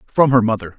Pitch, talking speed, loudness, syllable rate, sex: 120 Hz, 230 wpm, -16 LUFS, 6.2 syllables/s, male